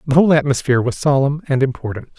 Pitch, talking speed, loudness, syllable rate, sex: 140 Hz, 190 wpm, -17 LUFS, 7.1 syllables/s, male